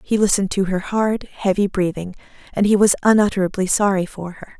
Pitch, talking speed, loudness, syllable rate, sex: 195 Hz, 185 wpm, -18 LUFS, 5.7 syllables/s, female